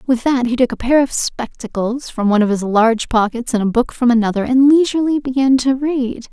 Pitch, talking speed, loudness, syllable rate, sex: 245 Hz, 230 wpm, -16 LUFS, 5.7 syllables/s, female